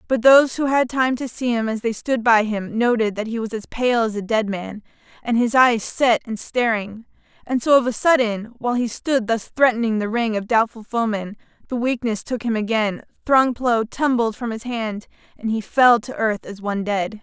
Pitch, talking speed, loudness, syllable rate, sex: 230 Hz, 220 wpm, -20 LUFS, 5.0 syllables/s, female